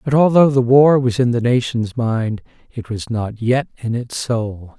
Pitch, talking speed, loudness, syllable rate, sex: 120 Hz, 200 wpm, -17 LUFS, 4.2 syllables/s, male